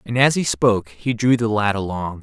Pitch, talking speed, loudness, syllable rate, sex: 110 Hz, 245 wpm, -19 LUFS, 5.2 syllables/s, male